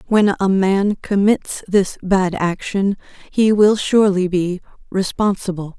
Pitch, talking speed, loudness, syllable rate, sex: 195 Hz, 125 wpm, -17 LUFS, 3.8 syllables/s, female